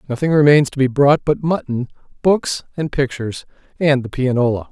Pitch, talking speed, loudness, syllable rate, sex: 140 Hz, 165 wpm, -17 LUFS, 5.4 syllables/s, male